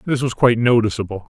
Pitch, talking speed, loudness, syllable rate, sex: 115 Hz, 175 wpm, -17 LUFS, 6.8 syllables/s, male